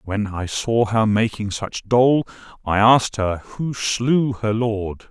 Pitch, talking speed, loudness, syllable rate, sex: 110 Hz, 175 wpm, -20 LUFS, 3.7 syllables/s, male